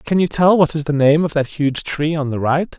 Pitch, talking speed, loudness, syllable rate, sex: 155 Hz, 300 wpm, -17 LUFS, 5.1 syllables/s, male